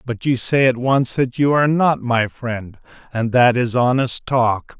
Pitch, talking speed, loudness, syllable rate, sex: 125 Hz, 200 wpm, -18 LUFS, 4.2 syllables/s, male